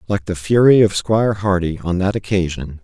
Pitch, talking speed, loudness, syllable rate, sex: 95 Hz, 190 wpm, -17 LUFS, 5.4 syllables/s, male